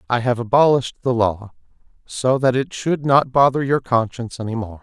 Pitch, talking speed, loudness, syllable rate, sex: 120 Hz, 185 wpm, -19 LUFS, 5.4 syllables/s, male